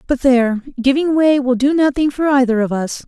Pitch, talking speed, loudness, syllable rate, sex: 265 Hz, 215 wpm, -15 LUFS, 5.5 syllables/s, female